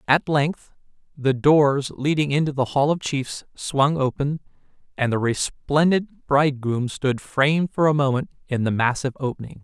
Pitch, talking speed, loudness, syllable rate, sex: 140 Hz, 155 wpm, -22 LUFS, 4.7 syllables/s, male